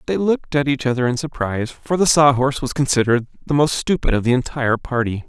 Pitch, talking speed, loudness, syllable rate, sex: 130 Hz, 225 wpm, -19 LUFS, 6.3 syllables/s, male